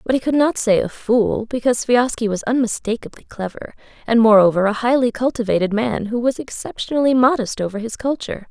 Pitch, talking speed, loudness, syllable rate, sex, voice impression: 230 Hz, 175 wpm, -18 LUFS, 5.9 syllables/s, female, very feminine, slightly young, slightly adult-like, very thin, slightly tensed, slightly weak, bright, slightly soft, clear, slightly muffled, very cute, intellectual, very refreshing, sincere, very calm, friendly, very reassuring, slightly unique, very elegant, slightly wild, sweet, slightly strict, slightly sharp